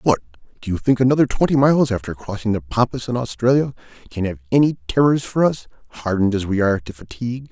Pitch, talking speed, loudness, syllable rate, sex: 115 Hz, 200 wpm, -19 LUFS, 6.6 syllables/s, male